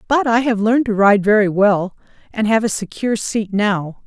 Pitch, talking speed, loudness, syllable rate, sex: 210 Hz, 205 wpm, -16 LUFS, 5.1 syllables/s, female